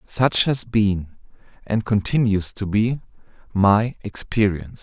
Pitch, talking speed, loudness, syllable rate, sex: 105 Hz, 110 wpm, -21 LUFS, 3.8 syllables/s, male